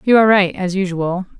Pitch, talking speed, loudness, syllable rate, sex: 190 Hz, 215 wpm, -16 LUFS, 5.8 syllables/s, female